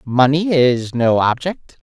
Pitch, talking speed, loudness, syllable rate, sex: 135 Hz, 130 wpm, -16 LUFS, 3.5 syllables/s, female